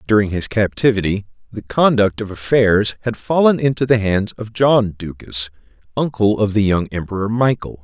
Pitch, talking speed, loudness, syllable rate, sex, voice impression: 110 Hz, 160 wpm, -17 LUFS, 5.0 syllables/s, male, very masculine, very adult-like, slightly middle-aged, very thick, very tensed, powerful, bright, soft, slightly muffled, fluent, very cool, intellectual, sincere, very calm, very mature, friendly, elegant, slightly wild, lively, kind, intense